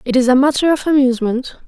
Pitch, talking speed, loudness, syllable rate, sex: 265 Hz, 215 wpm, -15 LUFS, 6.7 syllables/s, female